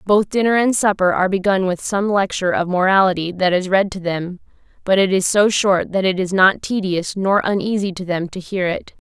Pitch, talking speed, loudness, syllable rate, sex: 190 Hz, 220 wpm, -17 LUFS, 5.4 syllables/s, female